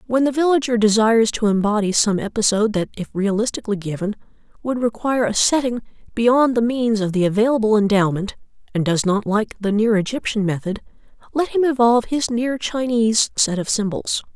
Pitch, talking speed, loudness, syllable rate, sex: 220 Hz, 165 wpm, -19 LUFS, 5.7 syllables/s, female